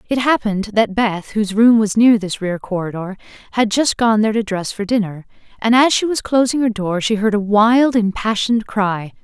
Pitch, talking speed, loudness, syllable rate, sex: 215 Hz, 210 wpm, -16 LUFS, 5.2 syllables/s, female